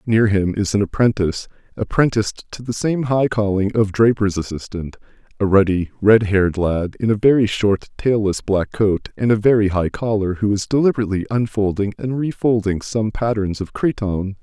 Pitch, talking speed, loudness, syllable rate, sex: 105 Hz, 170 wpm, -18 LUFS, 5.2 syllables/s, male